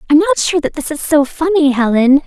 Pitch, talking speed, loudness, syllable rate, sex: 305 Hz, 240 wpm, -13 LUFS, 5.8 syllables/s, female